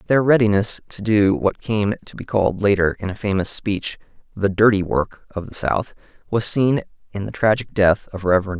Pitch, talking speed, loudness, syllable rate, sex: 100 Hz, 195 wpm, -20 LUFS, 4.9 syllables/s, male